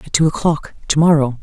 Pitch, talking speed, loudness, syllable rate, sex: 150 Hz, 210 wpm, -16 LUFS, 5.6 syllables/s, male